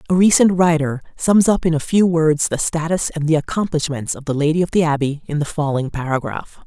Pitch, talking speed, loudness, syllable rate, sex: 160 Hz, 215 wpm, -18 LUFS, 5.7 syllables/s, female